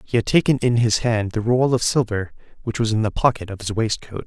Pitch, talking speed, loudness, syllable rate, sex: 115 Hz, 255 wpm, -20 LUFS, 5.7 syllables/s, male